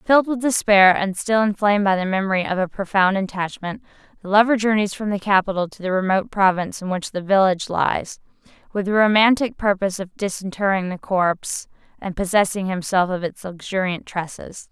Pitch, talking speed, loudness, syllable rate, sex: 195 Hz, 175 wpm, -20 LUFS, 5.7 syllables/s, female